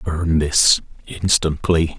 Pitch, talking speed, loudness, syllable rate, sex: 80 Hz, 90 wpm, -17 LUFS, 3.4 syllables/s, male